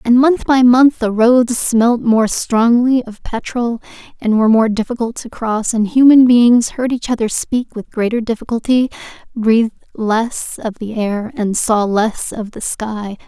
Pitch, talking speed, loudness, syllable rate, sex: 230 Hz, 170 wpm, -15 LUFS, 4.2 syllables/s, female